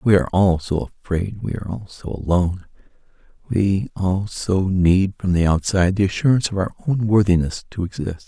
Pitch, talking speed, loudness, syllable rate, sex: 95 Hz, 180 wpm, -20 LUFS, 5.6 syllables/s, male